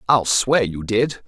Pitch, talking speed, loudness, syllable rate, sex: 115 Hz, 190 wpm, -19 LUFS, 3.6 syllables/s, male